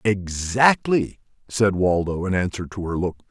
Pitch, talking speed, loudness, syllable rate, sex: 100 Hz, 145 wpm, -21 LUFS, 4.3 syllables/s, male